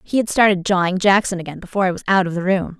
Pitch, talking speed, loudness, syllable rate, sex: 190 Hz, 280 wpm, -18 LUFS, 7.2 syllables/s, female